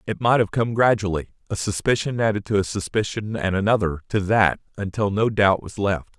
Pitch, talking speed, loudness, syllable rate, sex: 105 Hz, 195 wpm, -22 LUFS, 5.4 syllables/s, male